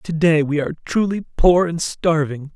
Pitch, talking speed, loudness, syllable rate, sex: 160 Hz, 165 wpm, -19 LUFS, 4.6 syllables/s, male